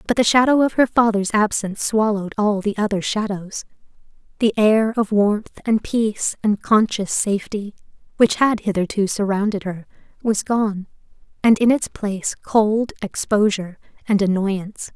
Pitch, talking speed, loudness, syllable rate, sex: 210 Hz, 145 wpm, -19 LUFS, 4.8 syllables/s, female